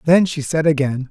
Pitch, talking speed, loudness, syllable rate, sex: 150 Hz, 220 wpm, -17 LUFS, 5.2 syllables/s, male